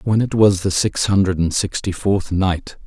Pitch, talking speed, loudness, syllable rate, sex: 95 Hz, 210 wpm, -18 LUFS, 4.4 syllables/s, male